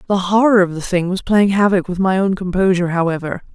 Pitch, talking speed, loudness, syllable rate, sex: 185 Hz, 220 wpm, -16 LUFS, 6.1 syllables/s, female